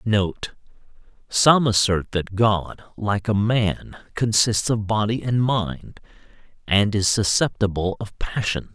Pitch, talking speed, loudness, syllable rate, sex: 105 Hz, 115 wpm, -21 LUFS, 3.8 syllables/s, male